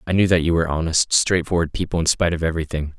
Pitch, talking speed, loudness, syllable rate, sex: 85 Hz, 260 wpm, -20 LUFS, 7.4 syllables/s, male